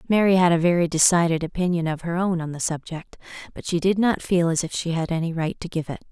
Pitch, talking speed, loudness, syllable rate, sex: 170 Hz, 255 wpm, -22 LUFS, 6.1 syllables/s, female